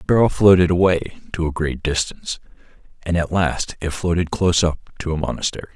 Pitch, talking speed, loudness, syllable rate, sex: 85 Hz, 190 wpm, -20 LUFS, 6.0 syllables/s, male